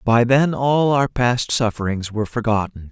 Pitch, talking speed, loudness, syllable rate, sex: 120 Hz, 165 wpm, -19 LUFS, 4.6 syllables/s, male